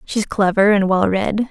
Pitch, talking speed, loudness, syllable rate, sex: 200 Hz, 200 wpm, -16 LUFS, 4.3 syllables/s, female